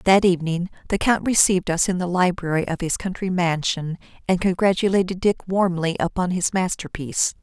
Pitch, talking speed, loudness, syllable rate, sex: 180 Hz, 160 wpm, -21 LUFS, 5.5 syllables/s, female